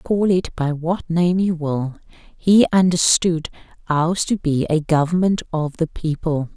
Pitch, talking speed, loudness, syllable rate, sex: 165 Hz, 155 wpm, -19 LUFS, 3.9 syllables/s, female